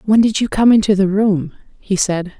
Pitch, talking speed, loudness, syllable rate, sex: 200 Hz, 225 wpm, -15 LUFS, 5.0 syllables/s, female